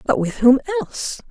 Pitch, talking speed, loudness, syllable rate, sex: 280 Hz, 185 wpm, -18 LUFS, 5.2 syllables/s, female